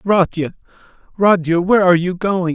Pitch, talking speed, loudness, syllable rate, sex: 180 Hz, 140 wpm, -16 LUFS, 5.3 syllables/s, male